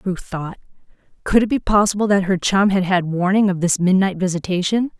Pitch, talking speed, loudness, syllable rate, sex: 190 Hz, 190 wpm, -18 LUFS, 5.5 syllables/s, female